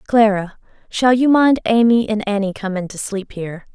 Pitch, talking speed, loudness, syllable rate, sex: 215 Hz, 160 wpm, -17 LUFS, 5.1 syllables/s, female